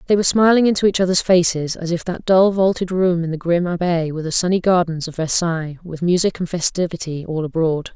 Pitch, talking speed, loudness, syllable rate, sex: 175 Hz, 220 wpm, -18 LUFS, 6.0 syllables/s, female